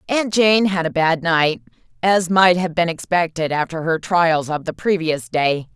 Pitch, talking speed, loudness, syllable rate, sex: 170 Hz, 190 wpm, -18 LUFS, 4.3 syllables/s, female